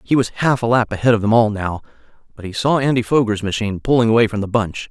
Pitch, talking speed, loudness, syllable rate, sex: 110 Hz, 255 wpm, -17 LUFS, 6.5 syllables/s, male